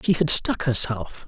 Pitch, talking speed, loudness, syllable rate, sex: 135 Hz, 190 wpm, -20 LUFS, 4.3 syllables/s, male